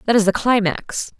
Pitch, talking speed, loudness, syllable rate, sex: 210 Hz, 200 wpm, -18 LUFS, 5.0 syllables/s, female